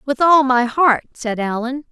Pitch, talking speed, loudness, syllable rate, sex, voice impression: 260 Hz, 190 wpm, -16 LUFS, 4.2 syllables/s, female, very feminine, very young, very thin, very tensed, powerful, very bright, hard, very clear, very fluent, very cute, slightly intellectual, very refreshing, slightly sincere, slightly calm, very friendly, very unique, very wild, sweet, lively, slightly kind, slightly strict, intense, slightly sharp, slightly modest